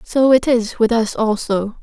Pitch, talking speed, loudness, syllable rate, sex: 230 Hz, 195 wpm, -16 LUFS, 4.2 syllables/s, female